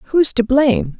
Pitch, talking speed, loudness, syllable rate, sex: 260 Hz, 180 wpm, -15 LUFS, 4.2 syllables/s, female